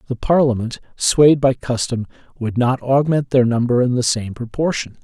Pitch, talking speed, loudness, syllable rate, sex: 125 Hz, 165 wpm, -18 LUFS, 4.8 syllables/s, male